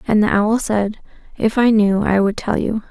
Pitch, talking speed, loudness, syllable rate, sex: 210 Hz, 230 wpm, -17 LUFS, 4.6 syllables/s, female